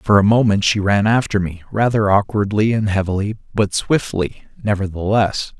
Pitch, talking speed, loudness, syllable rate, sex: 105 Hz, 150 wpm, -17 LUFS, 4.9 syllables/s, male